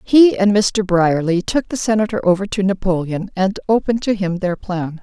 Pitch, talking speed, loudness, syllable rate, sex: 195 Hz, 190 wpm, -17 LUFS, 5.0 syllables/s, female